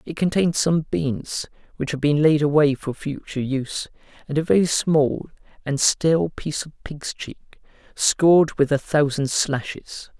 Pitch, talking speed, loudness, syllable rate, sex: 145 Hz, 160 wpm, -21 LUFS, 4.5 syllables/s, male